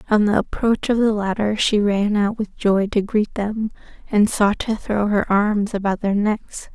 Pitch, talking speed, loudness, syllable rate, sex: 210 Hz, 205 wpm, -20 LUFS, 4.3 syllables/s, female